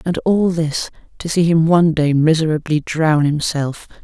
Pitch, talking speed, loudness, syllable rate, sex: 160 Hz, 165 wpm, -16 LUFS, 4.6 syllables/s, female